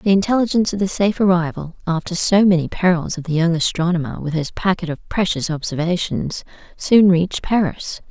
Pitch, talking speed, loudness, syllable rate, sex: 175 Hz, 170 wpm, -18 LUFS, 5.7 syllables/s, female